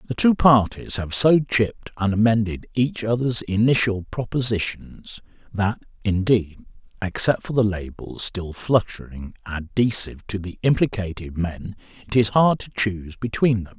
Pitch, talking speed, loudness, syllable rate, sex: 105 Hz, 140 wpm, -21 LUFS, 4.8 syllables/s, male